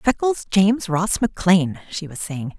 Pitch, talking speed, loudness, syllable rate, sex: 185 Hz, 160 wpm, -20 LUFS, 4.7 syllables/s, female